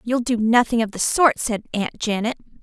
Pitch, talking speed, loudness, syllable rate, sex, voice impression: 230 Hz, 205 wpm, -20 LUFS, 5.3 syllables/s, female, feminine, slightly young, tensed, powerful, bright, clear, fluent, cute, slightly refreshing, friendly, slightly sharp